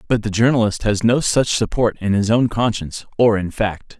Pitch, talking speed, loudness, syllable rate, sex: 110 Hz, 210 wpm, -18 LUFS, 5.2 syllables/s, male